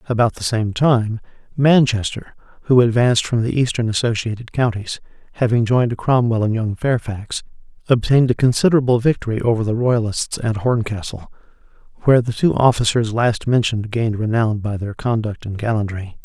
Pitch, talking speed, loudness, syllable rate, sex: 115 Hz, 150 wpm, -18 LUFS, 5.5 syllables/s, male